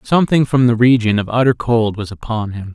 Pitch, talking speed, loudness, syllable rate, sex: 115 Hz, 220 wpm, -15 LUFS, 5.7 syllables/s, male